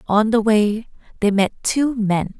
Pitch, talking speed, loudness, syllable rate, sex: 215 Hz, 175 wpm, -19 LUFS, 3.8 syllables/s, female